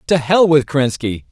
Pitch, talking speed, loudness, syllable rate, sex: 145 Hz, 180 wpm, -15 LUFS, 5.2 syllables/s, male